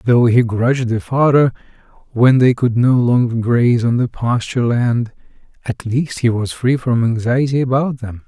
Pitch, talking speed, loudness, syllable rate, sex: 120 Hz, 175 wpm, -15 LUFS, 4.7 syllables/s, male